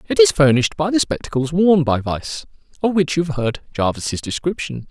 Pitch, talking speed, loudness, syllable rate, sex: 155 Hz, 195 wpm, -18 LUFS, 5.4 syllables/s, male